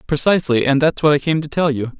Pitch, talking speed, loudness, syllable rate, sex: 145 Hz, 270 wpm, -16 LUFS, 6.5 syllables/s, male